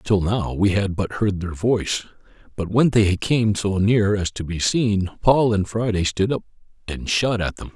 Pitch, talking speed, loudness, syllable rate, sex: 100 Hz, 210 wpm, -21 LUFS, 4.3 syllables/s, male